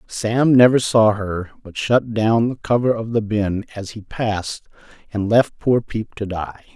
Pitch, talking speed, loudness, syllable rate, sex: 110 Hz, 185 wpm, -19 LUFS, 4.2 syllables/s, male